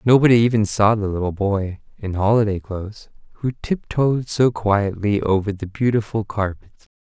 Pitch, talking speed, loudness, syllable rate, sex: 105 Hz, 145 wpm, -20 LUFS, 4.9 syllables/s, male